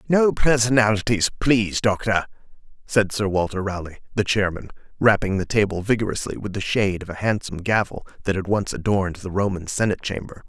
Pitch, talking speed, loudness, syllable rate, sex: 100 Hz, 165 wpm, -22 LUFS, 6.0 syllables/s, male